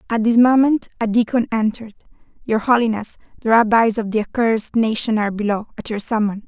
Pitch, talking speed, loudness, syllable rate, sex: 225 Hz, 175 wpm, -18 LUFS, 6.0 syllables/s, female